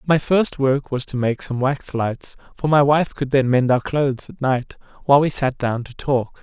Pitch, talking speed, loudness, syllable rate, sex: 135 Hz, 235 wpm, -20 LUFS, 4.7 syllables/s, male